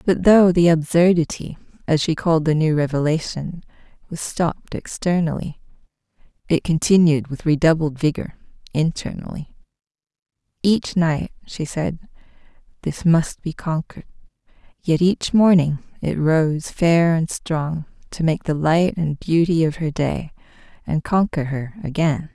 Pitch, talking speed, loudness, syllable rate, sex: 160 Hz, 130 wpm, -20 LUFS, 4.4 syllables/s, female